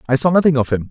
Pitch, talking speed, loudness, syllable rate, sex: 135 Hz, 330 wpm, -15 LUFS, 8.0 syllables/s, male